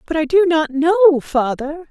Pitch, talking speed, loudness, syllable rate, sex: 315 Hz, 190 wpm, -16 LUFS, 4.7 syllables/s, female